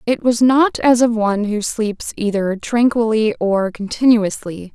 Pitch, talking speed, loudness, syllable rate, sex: 220 Hz, 150 wpm, -16 LUFS, 4.2 syllables/s, female